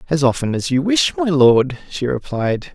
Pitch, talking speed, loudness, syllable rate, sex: 140 Hz, 195 wpm, -17 LUFS, 4.6 syllables/s, male